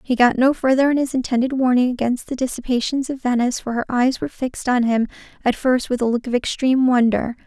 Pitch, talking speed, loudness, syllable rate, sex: 250 Hz, 225 wpm, -19 LUFS, 6.3 syllables/s, female